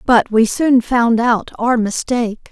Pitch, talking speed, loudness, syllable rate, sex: 235 Hz, 165 wpm, -15 LUFS, 3.8 syllables/s, female